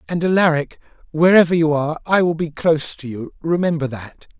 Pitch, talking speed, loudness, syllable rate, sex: 155 Hz, 180 wpm, -18 LUFS, 5.7 syllables/s, male